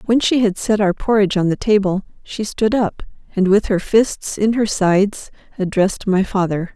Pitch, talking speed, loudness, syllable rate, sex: 200 Hz, 195 wpm, -17 LUFS, 5.0 syllables/s, female